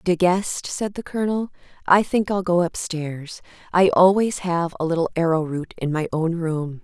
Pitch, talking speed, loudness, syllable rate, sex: 175 Hz, 175 wpm, -21 LUFS, 4.5 syllables/s, female